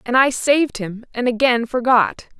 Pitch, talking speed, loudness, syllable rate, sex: 245 Hz, 150 wpm, -18 LUFS, 4.8 syllables/s, female